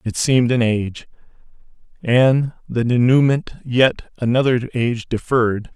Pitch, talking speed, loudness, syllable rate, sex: 125 Hz, 115 wpm, -18 LUFS, 4.8 syllables/s, male